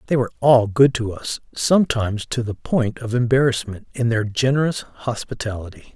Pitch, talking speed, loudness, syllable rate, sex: 120 Hz, 160 wpm, -20 LUFS, 5.3 syllables/s, male